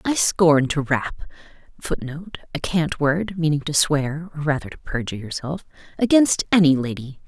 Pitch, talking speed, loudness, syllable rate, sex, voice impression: 155 Hz, 155 wpm, -21 LUFS, 2.1 syllables/s, female, feminine, very adult-like, slightly fluent, slightly intellectual, calm, slightly sweet